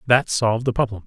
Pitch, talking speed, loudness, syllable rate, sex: 115 Hz, 225 wpm, -20 LUFS, 6.5 syllables/s, male